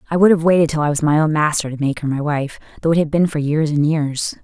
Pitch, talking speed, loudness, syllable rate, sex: 155 Hz, 310 wpm, -17 LUFS, 6.4 syllables/s, female